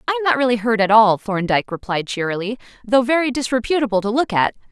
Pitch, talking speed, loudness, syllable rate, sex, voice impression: 230 Hz, 205 wpm, -18 LUFS, 6.6 syllables/s, female, feminine, adult-like, fluent, sincere, slightly intense